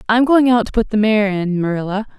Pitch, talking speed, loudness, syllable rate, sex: 215 Hz, 245 wpm, -16 LUFS, 5.7 syllables/s, female